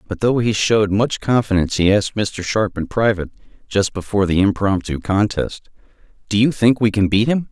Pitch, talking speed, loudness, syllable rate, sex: 105 Hz, 190 wpm, -18 LUFS, 5.8 syllables/s, male